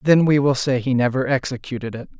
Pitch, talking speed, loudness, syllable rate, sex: 130 Hz, 220 wpm, -20 LUFS, 6.0 syllables/s, male